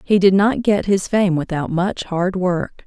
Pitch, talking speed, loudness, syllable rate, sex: 190 Hz, 210 wpm, -18 LUFS, 4.0 syllables/s, female